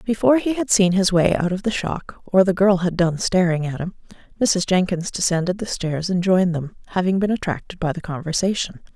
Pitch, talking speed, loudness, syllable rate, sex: 185 Hz, 215 wpm, -20 LUFS, 5.6 syllables/s, female